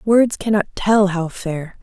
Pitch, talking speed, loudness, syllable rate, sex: 195 Hz, 165 wpm, -18 LUFS, 3.7 syllables/s, female